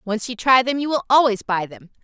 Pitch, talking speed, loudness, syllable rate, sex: 235 Hz, 265 wpm, -19 LUFS, 5.6 syllables/s, female